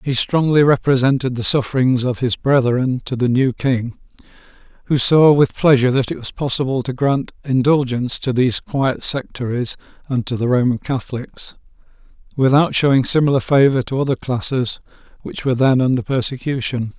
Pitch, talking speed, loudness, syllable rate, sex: 130 Hz, 155 wpm, -17 LUFS, 5.3 syllables/s, male